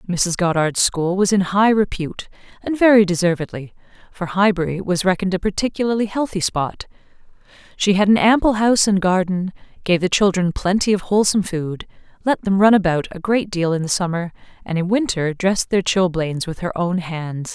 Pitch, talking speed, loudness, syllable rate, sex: 190 Hz, 175 wpm, -18 LUFS, 5.5 syllables/s, female